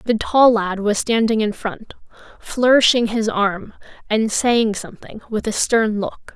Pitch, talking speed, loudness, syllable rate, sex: 220 Hz, 160 wpm, -18 LUFS, 4.1 syllables/s, female